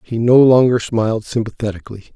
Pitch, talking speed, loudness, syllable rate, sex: 115 Hz, 140 wpm, -15 LUFS, 6.1 syllables/s, male